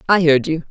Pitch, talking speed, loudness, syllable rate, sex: 175 Hz, 255 wpm, -15 LUFS, 6.3 syllables/s, female